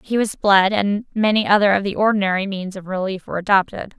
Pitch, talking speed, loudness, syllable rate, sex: 200 Hz, 210 wpm, -18 LUFS, 6.1 syllables/s, female